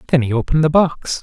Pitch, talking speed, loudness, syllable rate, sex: 145 Hz, 245 wpm, -16 LUFS, 7.1 syllables/s, male